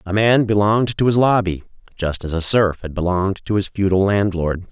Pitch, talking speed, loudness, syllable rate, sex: 100 Hz, 205 wpm, -18 LUFS, 5.5 syllables/s, male